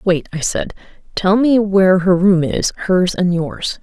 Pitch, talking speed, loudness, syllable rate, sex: 185 Hz, 190 wpm, -15 LUFS, 4.2 syllables/s, female